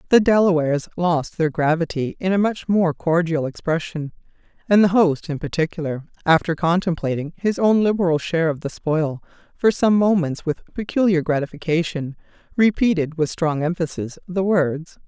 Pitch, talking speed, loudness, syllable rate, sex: 170 Hz, 145 wpm, -20 LUFS, 5.1 syllables/s, female